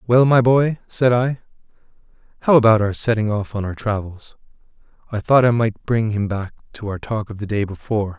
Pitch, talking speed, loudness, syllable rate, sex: 110 Hz, 200 wpm, -19 LUFS, 5.4 syllables/s, male